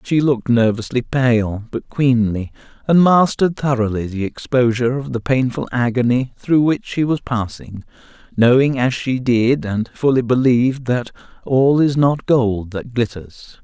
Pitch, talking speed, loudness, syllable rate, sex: 125 Hz, 150 wpm, -17 LUFS, 4.4 syllables/s, male